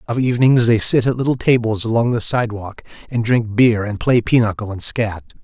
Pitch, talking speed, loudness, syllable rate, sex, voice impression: 115 Hz, 200 wpm, -17 LUFS, 5.5 syllables/s, male, masculine, middle-aged, slightly powerful, muffled, slightly raspy, calm, mature, slightly friendly, wild, kind